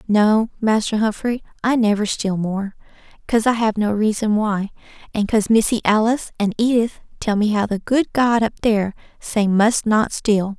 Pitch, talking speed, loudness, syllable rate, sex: 215 Hz, 175 wpm, -19 LUFS, 4.9 syllables/s, female